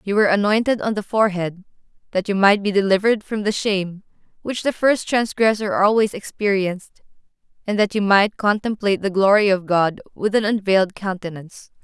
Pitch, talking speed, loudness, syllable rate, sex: 200 Hz, 165 wpm, -19 LUFS, 5.7 syllables/s, female